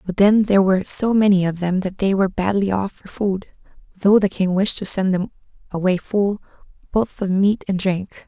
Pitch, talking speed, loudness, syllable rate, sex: 195 Hz, 210 wpm, -19 LUFS, 5.2 syllables/s, female